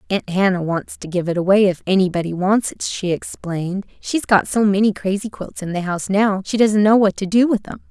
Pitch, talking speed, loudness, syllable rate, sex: 195 Hz, 235 wpm, -18 LUFS, 5.5 syllables/s, female